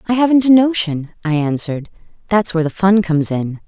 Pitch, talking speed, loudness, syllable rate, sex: 180 Hz, 195 wpm, -15 LUFS, 6.1 syllables/s, female